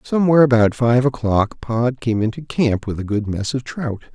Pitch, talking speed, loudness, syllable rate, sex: 120 Hz, 205 wpm, -18 LUFS, 5.1 syllables/s, male